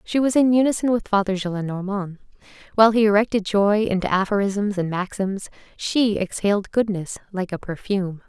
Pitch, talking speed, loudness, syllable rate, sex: 200 Hz, 150 wpm, -21 LUFS, 5.4 syllables/s, female